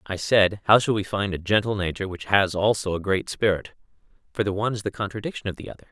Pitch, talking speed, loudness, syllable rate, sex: 100 Hz, 245 wpm, -23 LUFS, 6.8 syllables/s, male